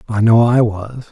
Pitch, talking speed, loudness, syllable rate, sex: 115 Hz, 215 wpm, -13 LUFS, 4.6 syllables/s, male